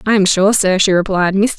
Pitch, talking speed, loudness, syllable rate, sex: 195 Hz, 265 wpm, -13 LUFS, 5.4 syllables/s, female